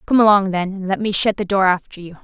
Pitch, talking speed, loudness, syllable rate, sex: 195 Hz, 295 wpm, -17 LUFS, 6.3 syllables/s, female